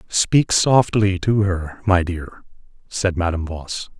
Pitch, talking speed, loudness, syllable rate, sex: 95 Hz, 135 wpm, -19 LUFS, 3.7 syllables/s, male